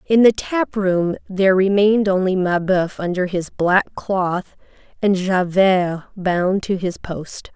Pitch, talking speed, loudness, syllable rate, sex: 190 Hz, 145 wpm, -18 LUFS, 3.7 syllables/s, female